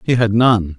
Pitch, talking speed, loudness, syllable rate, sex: 105 Hz, 230 wpm, -14 LUFS, 4.4 syllables/s, male